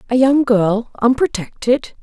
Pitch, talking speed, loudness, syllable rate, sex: 240 Hz, 120 wpm, -16 LUFS, 4.1 syllables/s, female